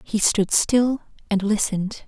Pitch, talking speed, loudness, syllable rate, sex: 210 Hz, 145 wpm, -21 LUFS, 4.2 syllables/s, female